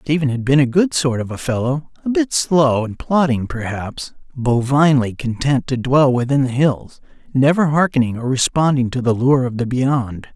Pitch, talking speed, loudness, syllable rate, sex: 135 Hz, 185 wpm, -17 LUFS, 4.8 syllables/s, male